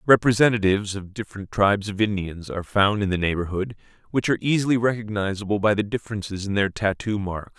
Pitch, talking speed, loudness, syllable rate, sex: 105 Hz, 175 wpm, -23 LUFS, 6.4 syllables/s, male